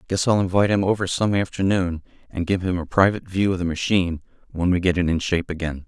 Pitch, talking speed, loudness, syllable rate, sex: 90 Hz, 235 wpm, -21 LUFS, 6.6 syllables/s, male